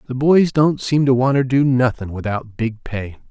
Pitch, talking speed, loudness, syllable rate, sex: 125 Hz, 200 wpm, -18 LUFS, 4.7 syllables/s, male